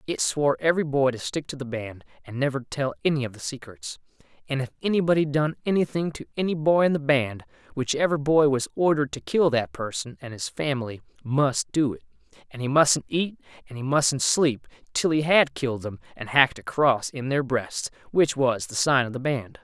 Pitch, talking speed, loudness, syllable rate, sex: 135 Hz, 210 wpm, -24 LUFS, 5.5 syllables/s, male